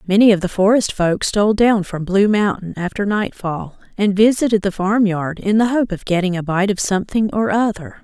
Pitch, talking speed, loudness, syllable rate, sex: 200 Hz, 200 wpm, -17 LUFS, 5.2 syllables/s, female